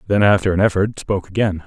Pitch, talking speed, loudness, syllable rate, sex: 100 Hz, 215 wpm, -18 LUFS, 7.1 syllables/s, male